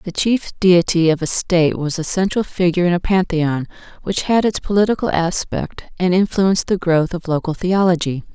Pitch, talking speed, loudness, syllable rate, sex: 180 Hz, 180 wpm, -17 LUFS, 5.3 syllables/s, female